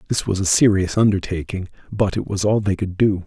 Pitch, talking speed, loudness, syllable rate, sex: 100 Hz, 220 wpm, -19 LUFS, 5.6 syllables/s, male